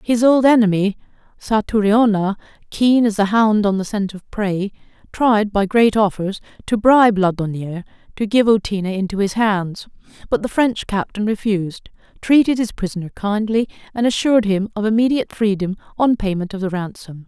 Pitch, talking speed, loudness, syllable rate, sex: 210 Hz, 160 wpm, -18 LUFS, 5.2 syllables/s, female